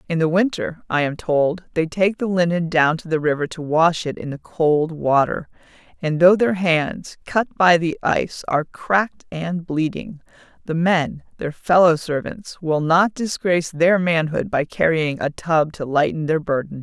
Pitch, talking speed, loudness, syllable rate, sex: 165 Hz, 180 wpm, -20 LUFS, 4.4 syllables/s, female